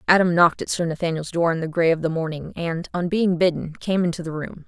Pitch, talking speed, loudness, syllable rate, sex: 170 Hz, 255 wpm, -22 LUFS, 6.0 syllables/s, female